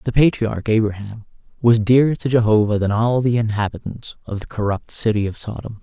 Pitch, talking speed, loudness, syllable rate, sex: 110 Hz, 175 wpm, -19 LUFS, 5.5 syllables/s, male